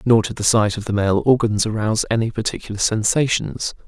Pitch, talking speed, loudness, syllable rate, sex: 110 Hz, 185 wpm, -19 LUFS, 5.8 syllables/s, male